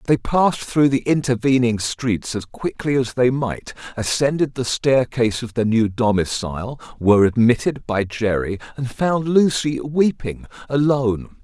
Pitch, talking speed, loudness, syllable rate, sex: 125 Hz, 140 wpm, -19 LUFS, 4.5 syllables/s, male